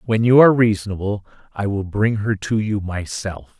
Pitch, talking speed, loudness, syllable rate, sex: 105 Hz, 185 wpm, -18 LUFS, 5.0 syllables/s, male